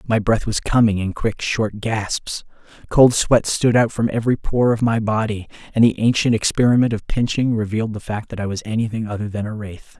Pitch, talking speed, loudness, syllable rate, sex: 110 Hz, 210 wpm, -19 LUFS, 5.3 syllables/s, male